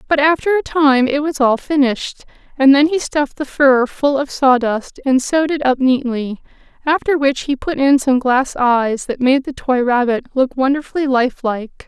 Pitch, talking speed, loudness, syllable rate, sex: 270 Hz, 195 wpm, -16 LUFS, 4.8 syllables/s, female